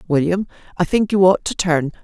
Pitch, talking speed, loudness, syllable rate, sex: 180 Hz, 205 wpm, -18 LUFS, 5.3 syllables/s, female